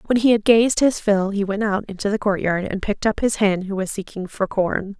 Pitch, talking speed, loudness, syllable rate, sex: 205 Hz, 265 wpm, -20 LUFS, 5.4 syllables/s, female